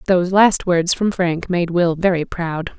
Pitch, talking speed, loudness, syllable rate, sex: 175 Hz, 195 wpm, -17 LUFS, 4.2 syllables/s, female